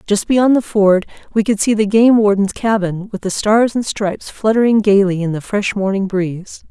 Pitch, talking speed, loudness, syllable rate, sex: 205 Hz, 205 wpm, -15 LUFS, 5.0 syllables/s, female